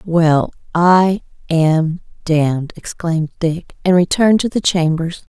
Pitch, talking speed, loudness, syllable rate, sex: 170 Hz, 90 wpm, -16 LUFS, 4.0 syllables/s, female